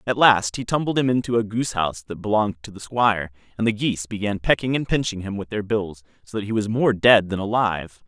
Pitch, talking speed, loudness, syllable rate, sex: 105 Hz, 245 wpm, -22 LUFS, 6.2 syllables/s, male